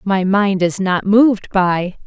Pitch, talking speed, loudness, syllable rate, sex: 195 Hz, 175 wpm, -15 LUFS, 3.7 syllables/s, female